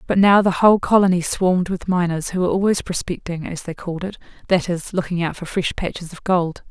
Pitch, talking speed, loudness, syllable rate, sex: 180 Hz, 215 wpm, -19 LUFS, 6.0 syllables/s, female